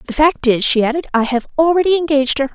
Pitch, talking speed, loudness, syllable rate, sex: 285 Hz, 235 wpm, -15 LUFS, 6.5 syllables/s, female